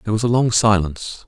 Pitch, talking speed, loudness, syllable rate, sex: 105 Hz, 235 wpm, -17 LUFS, 6.8 syllables/s, male